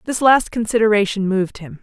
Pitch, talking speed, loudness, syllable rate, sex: 210 Hz, 165 wpm, -17 LUFS, 5.9 syllables/s, female